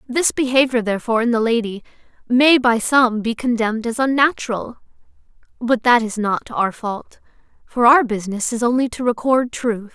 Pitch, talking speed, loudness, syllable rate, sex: 235 Hz, 165 wpm, -18 LUFS, 5.2 syllables/s, female